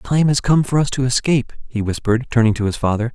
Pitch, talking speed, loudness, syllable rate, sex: 125 Hz, 265 wpm, -18 LUFS, 6.7 syllables/s, male